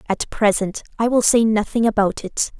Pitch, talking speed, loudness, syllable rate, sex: 215 Hz, 185 wpm, -19 LUFS, 5.0 syllables/s, female